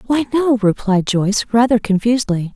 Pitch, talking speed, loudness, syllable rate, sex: 225 Hz, 140 wpm, -16 LUFS, 5.2 syllables/s, female